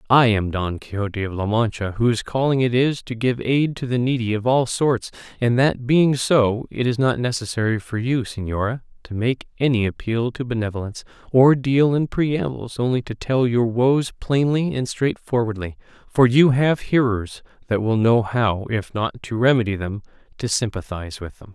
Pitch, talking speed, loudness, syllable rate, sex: 120 Hz, 185 wpm, -21 LUFS, 4.9 syllables/s, male